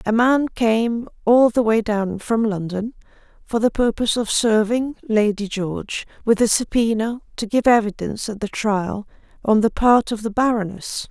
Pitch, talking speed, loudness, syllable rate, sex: 220 Hz, 165 wpm, -20 LUFS, 4.6 syllables/s, female